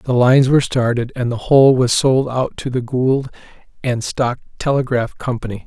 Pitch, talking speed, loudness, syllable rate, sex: 125 Hz, 180 wpm, -17 LUFS, 5.1 syllables/s, male